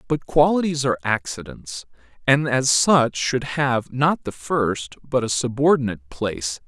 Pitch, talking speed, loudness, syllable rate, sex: 125 Hz, 145 wpm, -21 LUFS, 4.4 syllables/s, male